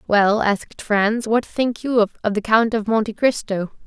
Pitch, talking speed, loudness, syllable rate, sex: 220 Hz, 185 wpm, -19 LUFS, 4.3 syllables/s, female